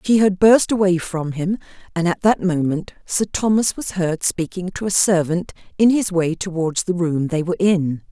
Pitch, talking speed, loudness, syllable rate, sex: 180 Hz, 200 wpm, -19 LUFS, 4.7 syllables/s, female